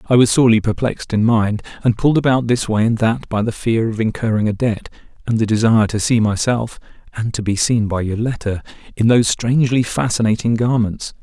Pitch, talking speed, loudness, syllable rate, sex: 115 Hz, 200 wpm, -17 LUFS, 5.3 syllables/s, male